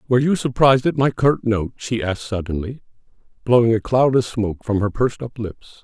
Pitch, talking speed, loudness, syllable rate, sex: 115 Hz, 205 wpm, -19 LUFS, 6.0 syllables/s, male